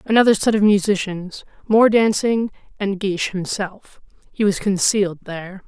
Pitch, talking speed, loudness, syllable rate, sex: 200 Hz, 125 wpm, -18 LUFS, 4.8 syllables/s, female